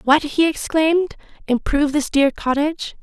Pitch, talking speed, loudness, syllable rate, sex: 295 Hz, 120 wpm, -19 LUFS, 5.1 syllables/s, female